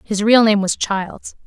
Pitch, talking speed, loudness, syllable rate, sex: 205 Hz, 205 wpm, -16 LUFS, 3.9 syllables/s, female